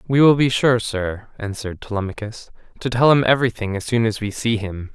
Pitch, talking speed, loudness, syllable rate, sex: 115 Hz, 205 wpm, -20 LUFS, 5.7 syllables/s, male